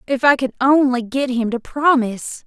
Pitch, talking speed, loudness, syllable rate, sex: 255 Hz, 195 wpm, -17 LUFS, 4.9 syllables/s, female